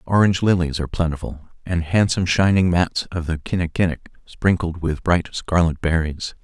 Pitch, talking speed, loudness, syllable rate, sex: 85 Hz, 150 wpm, -20 LUFS, 5.4 syllables/s, male